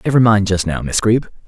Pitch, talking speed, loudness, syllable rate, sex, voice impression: 105 Hz, 245 wpm, -15 LUFS, 5.9 syllables/s, male, masculine, adult-like, tensed, powerful, clear, fluent, intellectual, calm, friendly, reassuring, wild, lively, kind, slightly modest